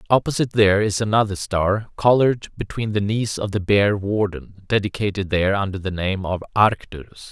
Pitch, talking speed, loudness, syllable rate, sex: 100 Hz, 165 wpm, -20 LUFS, 5.4 syllables/s, male